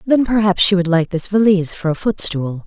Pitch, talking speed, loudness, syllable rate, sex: 185 Hz, 225 wpm, -16 LUFS, 5.5 syllables/s, female